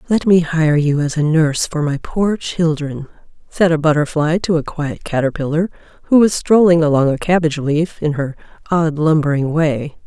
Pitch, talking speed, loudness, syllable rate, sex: 155 Hz, 180 wpm, -16 LUFS, 5.0 syllables/s, female